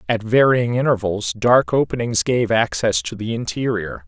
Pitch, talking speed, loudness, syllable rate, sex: 110 Hz, 145 wpm, -19 LUFS, 4.7 syllables/s, male